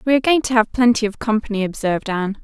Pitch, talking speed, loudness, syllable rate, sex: 225 Hz, 245 wpm, -18 LUFS, 7.4 syllables/s, female